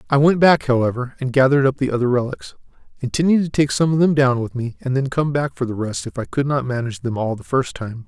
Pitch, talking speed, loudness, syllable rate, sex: 130 Hz, 270 wpm, -19 LUFS, 6.3 syllables/s, male